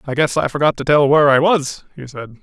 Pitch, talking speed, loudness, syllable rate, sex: 145 Hz, 270 wpm, -15 LUFS, 6.0 syllables/s, male